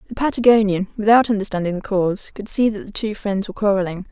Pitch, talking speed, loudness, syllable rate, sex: 205 Hz, 205 wpm, -19 LUFS, 6.6 syllables/s, female